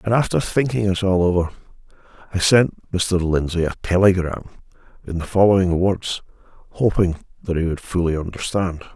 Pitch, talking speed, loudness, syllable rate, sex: 90 Hz, 145 wpm, -20 LUFS, 5.3 syllables/s, male